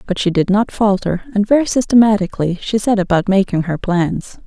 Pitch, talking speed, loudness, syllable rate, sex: 200 Hz, 190 wpm, -15 LUFS, 5.6 syllables/s, female